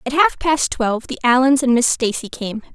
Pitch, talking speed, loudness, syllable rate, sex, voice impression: 255 Hz, 220 wpm, -17 LUFS, 5.2 syllables/s, female, very feminine, young, very thin, tensed, powerful, very bright, hard, very clear, very fluent, slightly raspy, slightly cute, cool, slightly intellectual, very refreshing, sincere, friendly, reassuring, very unique, elegant, slightly sweet, very strict, very intense, very sharp